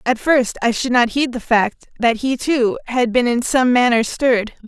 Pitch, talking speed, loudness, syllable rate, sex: 240 Hz, 220 wpm, -17 LUFS, 4.6 syllables/s, female